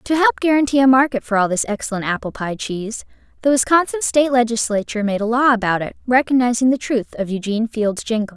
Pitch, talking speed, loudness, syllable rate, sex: 240 Hz, 200 wpm, -18 LUFS, 6.3 syllables/s, female